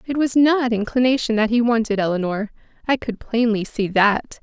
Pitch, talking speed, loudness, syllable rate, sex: 230 Hz, 175 wpm, -19 LUFS, 5.1 syllables/s, female